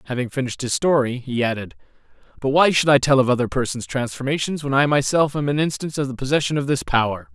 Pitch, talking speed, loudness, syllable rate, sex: 135 Hz, 220 wpm, -20 LUFS, 6.6 syllables/s, male